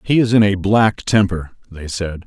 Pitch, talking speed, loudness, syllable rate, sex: 100 Hz, 210 wpm, -16 LUFS, 4.6 syllables/s, male